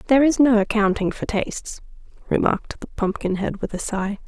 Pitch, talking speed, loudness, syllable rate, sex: 215 Hz, 170 wpm, -21 LUFS, 5.6 syllables/s, female